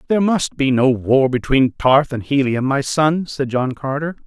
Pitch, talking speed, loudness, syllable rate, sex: 140 Hz, 195 wpm, -17 LUFS, 4.5 syllables/s, male